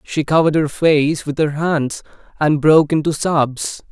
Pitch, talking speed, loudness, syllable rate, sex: 150 Hz, 170 wpm, -16 LUFS, 4.4 syllables/s, male